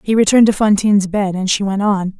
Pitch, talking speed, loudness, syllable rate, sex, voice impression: 200 Hz, 245 wpm, -14 LUFS, 6.2 syllables/s, female, feminine, adult-like, clear, intellectual, slightly strict